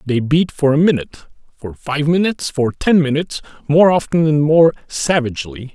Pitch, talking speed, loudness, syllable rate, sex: 150 Hz, 165 wpm, -16 LUFS, 5.3 syllables/s, male